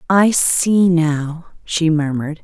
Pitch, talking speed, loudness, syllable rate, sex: 165 Hz, 125 wpm, -16 LUFS, 3.4 syllables/s, female